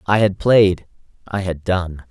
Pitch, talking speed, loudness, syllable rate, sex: 95 Hz, 145 wpm, -18 LUFS, 3.9 syllables/s, male